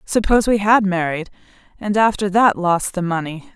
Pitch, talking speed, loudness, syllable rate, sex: 195 Hz, 170 wpm, -17 LUFS, 5.0 syllables/s, female